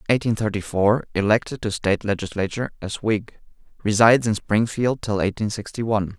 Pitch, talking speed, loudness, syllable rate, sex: 105 Hz, 145 wpm, -22 LUFS, 5.9 syllables/s, male